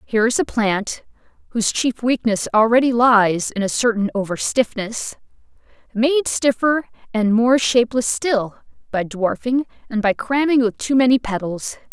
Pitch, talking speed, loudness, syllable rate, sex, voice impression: 230 Hz, 145 wpm, -19 LUFS, 4.3 syllables/s, female, very feminine, young, very thin, tensed, powerful, bright, very hard, very clear, very fluent, cute, slightly cool, intellectual, very refreshing, sincere, calm, friendly, very reassuring, unique, slightly elegant, wild, slightly sweet, lively, slightly strict, intense, slightly sharp, light